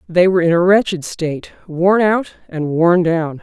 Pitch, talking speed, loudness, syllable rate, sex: 175 Hz, 195 wpm, -15 LUFS, 4.8 syllables/s, female